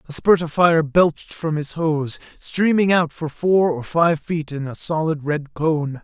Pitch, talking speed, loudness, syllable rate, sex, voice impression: 160 Hz, 200 wpm, -20 LUFS, 4.0 syllables/s, male, masculine, adult-like, slightly thick, tensed, powerful, bright, clear, slightly halting, slightly mature, friendly, slightly unique, wild, lively, slightly sharp